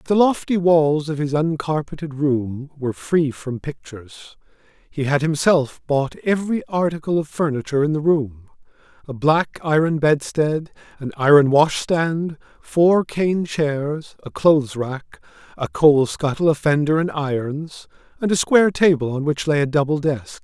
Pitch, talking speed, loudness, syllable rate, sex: 150 Hz, 155 wpm, -19 LUFS, 4.5 syllables/s, male